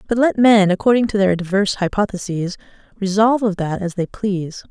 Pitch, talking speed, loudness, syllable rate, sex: 200 Hz, 180 wpm, -18 LUFS, 5.8 syllables/s, female